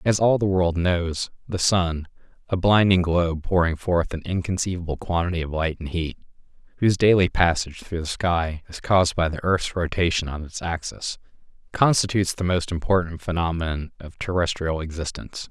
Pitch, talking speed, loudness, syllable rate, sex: 85 Hz, 165 wpm, -23 LUFS, 5.4 syllables/s, male